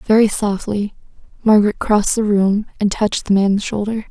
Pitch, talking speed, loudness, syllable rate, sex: 205 Hz, 160 wpm, -17 LUFS, 5.3 syllables/s, female